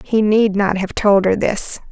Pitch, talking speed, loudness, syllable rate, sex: 205 Hz, 220 wpm, -16 LUFS, 4.0 syllables/s, female